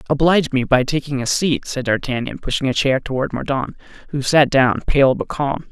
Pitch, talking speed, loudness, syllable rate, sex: 135 Hz, 200 wpm, -18 LUFS, 5.3 syllables/s, male